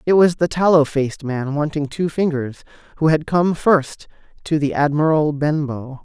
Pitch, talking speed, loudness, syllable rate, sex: 150 Hz, 170 wpm, -18 LUFS, 4.7 syllables/s, male